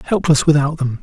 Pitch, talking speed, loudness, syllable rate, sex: 150 Hz, 175 wpm, -15 LUFS, 5.4 syllables/s, male